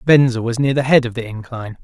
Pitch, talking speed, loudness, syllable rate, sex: 125 Hz, 260 wpm, -17 LUFS, 6.6 syllables/s, male